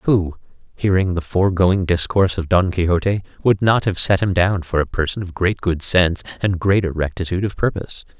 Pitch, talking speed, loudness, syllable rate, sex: 90 Hz, 190 wpm, -18 LUFS, 5.6 syllables/s, male